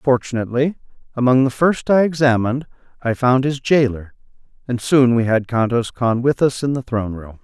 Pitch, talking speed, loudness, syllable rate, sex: 125 Hz, 175 wpm, -18 LUFS, 5.4 syllables/s, male